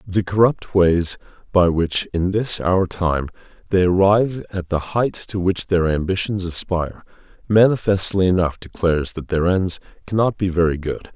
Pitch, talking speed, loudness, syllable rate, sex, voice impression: 95 Hz, 155 wpm, -19 LUFS, 4.7 syllables/s, male, very adult-like, very middle-aged, very thick, tensed, very powerful, slightly bright, very soft, slightly muffled, fluent, slightly raspy, very cool, very intellectual, slightly refreshing, very sincere, very calm, very mature, very friendly, very reassuring, very unique, elegant, very wild, sweet, lively, very kind, slightly modest